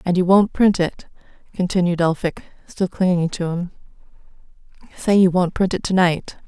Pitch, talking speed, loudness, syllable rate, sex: 180 Hz, 160 wpm, -19 LUFS, 5.1 syllables/s, female